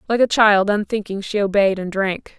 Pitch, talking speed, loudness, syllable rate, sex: 205 Hz, 200 wpm, -18 LUFS, 5.0 syllables/s, female